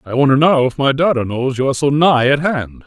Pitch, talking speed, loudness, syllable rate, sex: 140 Hz, 270 wpm, -15 LUFS, 5.8 syllables/s, male